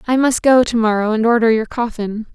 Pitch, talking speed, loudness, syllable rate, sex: 230 Hz, 230 wpm, -16 LUFS, 5.6 syllables/s, female